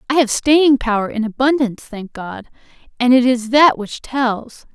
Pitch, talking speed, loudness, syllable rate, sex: 245 Hz, 175 wpm, -15 LUFS, 4.5 syllables/s, female